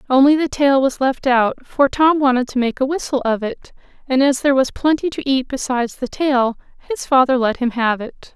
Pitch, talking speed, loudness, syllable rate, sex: 265 Hz, 225 wpm, -17 LUFS, 5.3 syllables/s, female